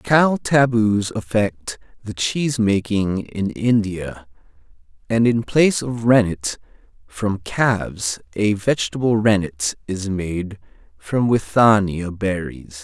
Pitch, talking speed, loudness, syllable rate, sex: 105 Hz, 105 wpm, -19 LUFS, 3.6 syllables/s, male